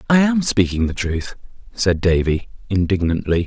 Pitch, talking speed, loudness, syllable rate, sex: 100 Hz, 140 wpm, -19 LUFS, 4.8 syllables/s, male